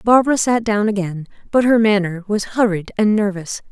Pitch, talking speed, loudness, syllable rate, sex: 210 Hz, 180 wpm, -17 LUFS, 5.3 syllables/s, female